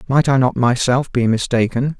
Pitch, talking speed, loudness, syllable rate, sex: 125 Hz, 180 wpm, -16 LUFS, 5.0 syllables/s, male